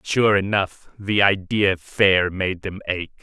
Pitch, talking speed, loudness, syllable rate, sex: 95 Hz, 150 wpm, -20 LUFS, 3.5 syllables/s, male